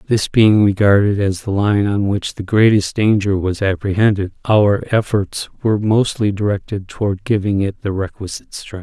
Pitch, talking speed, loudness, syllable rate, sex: 100 Hz, 165 wpm, -16 LUFS, 4.9 syllables/s, male